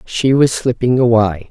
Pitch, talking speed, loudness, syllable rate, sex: 120 Hz, 160 wpm, -14 LUFS, 4.3 syllables/s, female